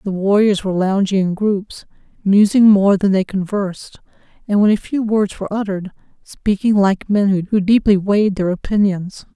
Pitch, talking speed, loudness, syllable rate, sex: 200 Hz, 165 wpm, -16 LUFS, 5.0 syllables/s, female